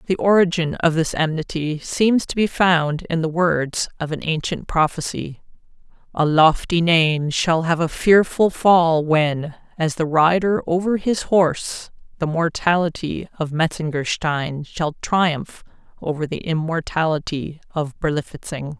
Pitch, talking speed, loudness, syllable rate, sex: 165 Hz, 130 wpm, -20 LUFS, 4.1 syllables/s, female